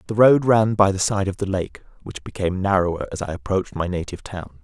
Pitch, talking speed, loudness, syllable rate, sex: 95 Hz, 235 wpm, -21 LUFS, 6.2 syllables/s, male